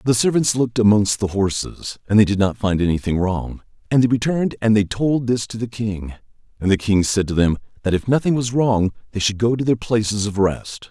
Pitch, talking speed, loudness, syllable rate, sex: 110 Hz, 230 wpm, -19 LUFS, 5.5 syllables/s, male